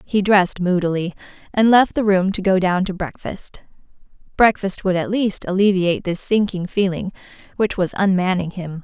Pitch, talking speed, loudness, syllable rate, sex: 190 Hz, 165 wpm, -19 LUFS, 5.1 syllables/s, female